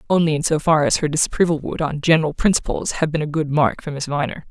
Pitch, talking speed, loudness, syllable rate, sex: 155 Hz, 255 wpm, -19 LUFS, 6.5 syllables/s, female